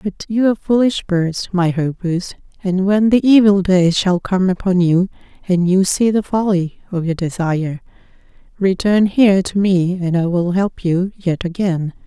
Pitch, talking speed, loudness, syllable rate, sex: 185 Hz, 175 wpm, -16 LUFS, 4.5 syllables/s, female